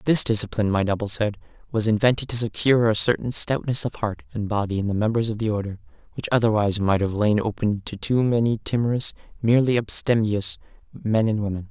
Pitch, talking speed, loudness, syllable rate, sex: 110 Hz, 190 wpm, -22 LUFS, 6.1 syllables/s, male